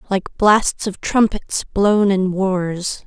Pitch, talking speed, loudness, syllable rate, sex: 195 Hz, 135 wpm, -18 LUFS, 2.9 syllables/s, female